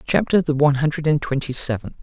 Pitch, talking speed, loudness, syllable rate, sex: 145 Hz, 210 wpm, -19 LUFS, 6.5 syllables/s, male